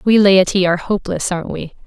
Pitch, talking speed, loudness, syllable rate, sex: 190 Hz, 195 wpm, -15 LUFS, 6.6 syllables/s, female